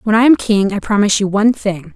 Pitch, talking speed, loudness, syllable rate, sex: 210 Hz, 275 wpm, -14 LUFS, 6.5 syllables/s, female